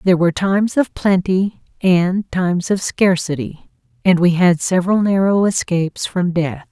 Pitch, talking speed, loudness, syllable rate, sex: 180 Hz, 150 wpm, -17 LUFS, 4.8 syllables/s, female